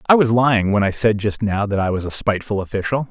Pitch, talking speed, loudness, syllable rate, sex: 105 Hz, 270 wpm, -18 LUFS, 6.4 syllables/s, male